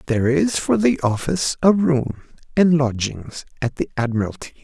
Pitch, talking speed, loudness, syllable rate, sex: 145 Hz, 155 wpm, -20 LUFS, 5.1 syllables/s, male